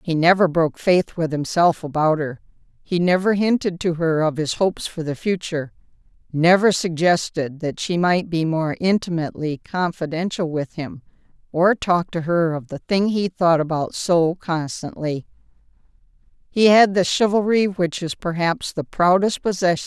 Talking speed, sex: 165 wpm, female